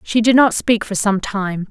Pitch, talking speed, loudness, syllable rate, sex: 210 Hz, 245 wpm, -16 LUFS, 4.4 syllables/s, female